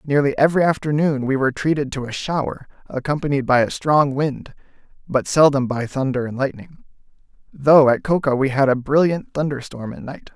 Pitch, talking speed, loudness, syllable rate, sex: 140 Hz, 180 wpm, -19 LUFS, 5.4 syllables/s, male